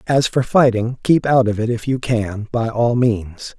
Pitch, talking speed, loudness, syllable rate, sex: 120 Hz, 215 wpm, -17 LUFS, 4.1 syllables/s, male